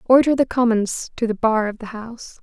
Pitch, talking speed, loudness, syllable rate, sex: 230 Hz, 225 wpm, -19 LUFS, 5.3 syllables/s, female